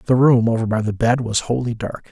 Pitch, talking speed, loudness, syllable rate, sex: 115 Hz, 255 wpm, -18 LUFS, 5.7 syllables/s, male